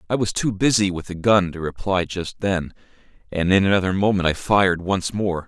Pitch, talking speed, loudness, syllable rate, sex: 95 Hz, 210 wpm, -21 LUFS, 5.3 syllables/s, male